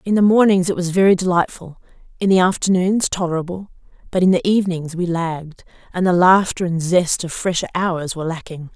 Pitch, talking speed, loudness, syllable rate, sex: 180 Hz, 185 wpm, -18 LUFS, 5.7 syllables/s, female